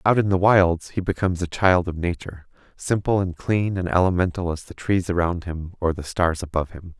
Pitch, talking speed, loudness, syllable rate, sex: 90 Hz, 215 wpm, -22 LUFS, 5.5 syllables/s, male